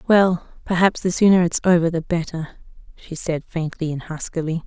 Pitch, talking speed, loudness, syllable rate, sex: 170 Hz, 165 wpm, -20 LUFS, 5.3 syllables/s, female